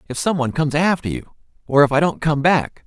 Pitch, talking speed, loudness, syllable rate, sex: 150 Hz, 230 wpm, -18 LUFS, 6.2 syllables/s, male